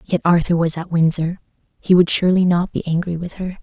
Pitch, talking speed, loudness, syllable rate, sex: 175 Hz, 215 wpm, -17 LUFS, 5.9 syllables/s, female